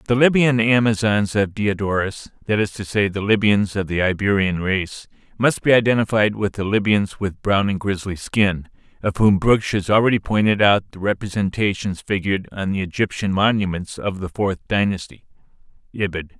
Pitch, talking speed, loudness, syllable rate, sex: 100 Hz, 155 wpm, -19 LUFS, 5.1 syllables/s, male